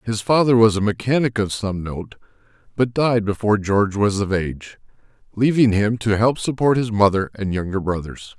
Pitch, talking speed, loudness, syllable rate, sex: 105 Hz, 180 wpm, -19 LUFS, 5.2 syllables/s, male